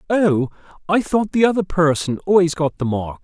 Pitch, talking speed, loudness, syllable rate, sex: 170 Hz, 185 wpm, -18 LUFS, 4.9 syllables/s, male